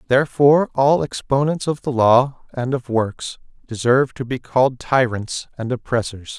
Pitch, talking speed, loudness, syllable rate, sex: 130 Hz, 150 wpm, -19 LUFS, 4.7 syllables/s, male